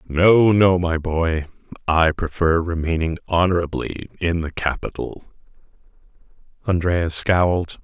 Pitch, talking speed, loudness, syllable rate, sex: 85 Hz, 100 wpm, -20 LUFS, 4.1 syllables/s, male